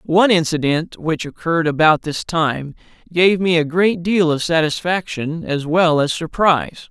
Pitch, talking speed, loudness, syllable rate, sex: 165 Hz, 155 wpm, -17 LUFS, 4.5 syllables/s, male